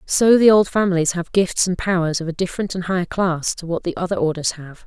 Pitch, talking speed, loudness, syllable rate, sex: 180 Hz, 245 wpm, -19 LUFS, 5.8 syllables/s, female